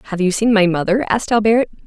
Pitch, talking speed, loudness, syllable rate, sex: 205 Hz, 225 wpm, -16 LUFS, 6.9 syllables/s, female